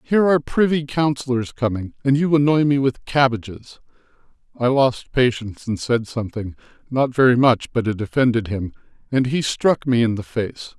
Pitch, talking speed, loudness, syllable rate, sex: 125 Hz, 165 wpm, -20 LUFS, 5.2 syllables/s, male